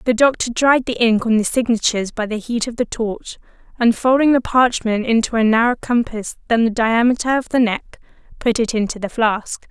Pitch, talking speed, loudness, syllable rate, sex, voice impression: 230 Hz, 205 wpm, -17 LUFS, 5.4 syllables/s, female, very feminine, slightly young, slightly adult-like, thin, tensed, powerful, bright, slightly hard, very clear, fluent, cute, intellectual, very refreshing, sincere, calm, friendly, reassuring, slightly unique, wild, sweet, lively, slightly strict, slightly intense